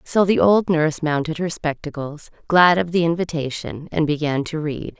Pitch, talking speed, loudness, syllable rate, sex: 155 Hz, 180 wpm, -20 LUFS, 4.9 syllables/s, female